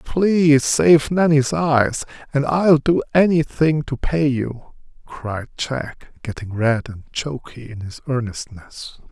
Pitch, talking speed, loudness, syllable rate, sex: 140 Hz, 140 wpm, -19 LUFS, 3.6 syllables/s, male